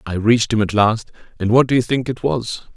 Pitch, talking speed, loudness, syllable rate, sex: 115 Hz, 260 wpm, -18 LUFS, 5.7 syllables/s, male